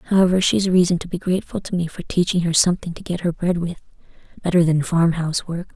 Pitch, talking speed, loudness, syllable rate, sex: 175 Hz, 230 wpm, -20 LUFS, 6.3 syllables/s, female